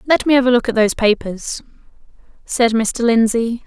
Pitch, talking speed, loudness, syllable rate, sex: 235 Hz, 180 wpm, -16 LUFS, 5.1 syllables/s, female